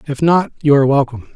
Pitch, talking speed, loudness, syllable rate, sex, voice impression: 145 Hz, 220 wpm, -14 LUFS, 7.6 syllables/s, male, masculine, old, slightly weak, halting, raspy, mature, friendly, reassuring, slightly wild, slightly strict, modest